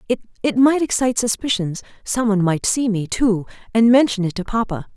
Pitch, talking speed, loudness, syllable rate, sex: 220 Hz, 180 wpm, -19 LUFS, 5.8 syllables/s, female